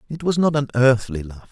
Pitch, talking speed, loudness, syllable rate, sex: 125 Hz, 235 wpm, -19 LUFS, 5.8 syllables/s, male